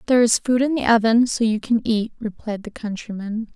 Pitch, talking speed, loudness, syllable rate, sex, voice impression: 225 Hz, 220 wpm, -20 LUFS, 5.4 syllables/s, female, feminine, slightly young, tensed, slightly weak, bright, soft, slightly raspy, slightly cute, calm, friendly, reassuring, elegant, kind, modest